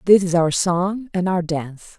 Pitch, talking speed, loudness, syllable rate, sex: 180 Hz, 210 wpm, -20 LUFS, 4.8 syllables/s, female